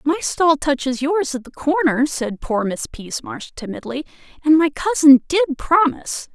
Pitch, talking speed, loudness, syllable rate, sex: 290 Hz, 160 wpm, -18 LUFS, 4.4 syllables/s, female